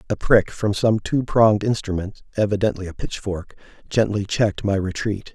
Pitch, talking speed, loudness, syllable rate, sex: 105 Hz, 155 wpm, -21 LUFS, 5.1 syllables/s, male